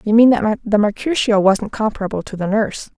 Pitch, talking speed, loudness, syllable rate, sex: 215 Hz, 200 wpm, -17 LUFS, 5.7 syllables/s, female